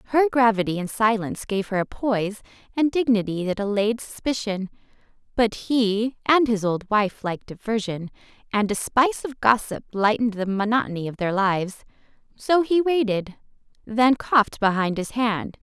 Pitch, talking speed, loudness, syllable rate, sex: 220 Hz, 155 wpm, -23 LUFS, 5.1 syllables/s, female